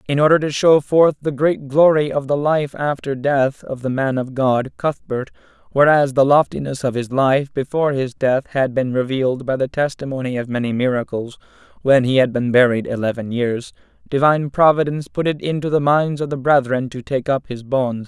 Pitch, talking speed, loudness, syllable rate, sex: 135 Hz, 195 wpm, -18 LUFS, 5.2 syllables/s, male